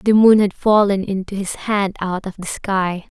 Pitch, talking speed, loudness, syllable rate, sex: 195 Hz, 205 wpm, -18 LUFS, 4.4 syllables/s, female